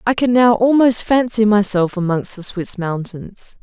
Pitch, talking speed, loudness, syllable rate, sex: 210 Hz, 165 wpm, -16 LUFS, 4.3 syllables/s, female